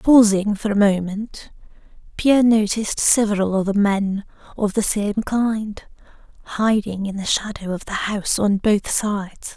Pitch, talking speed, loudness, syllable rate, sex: 205 Hz, 145 wpm, -19 LUFS, 4.5 syllables/s, female